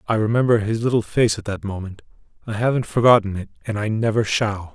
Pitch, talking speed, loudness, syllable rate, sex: 105 Hz, 200 wpm, -20 LUFS, 6.0 syllables/s, male